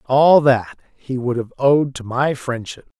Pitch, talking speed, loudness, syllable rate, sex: 130 Hz, 180 wpm, -18 LUFS, 3.8 syllables/s, male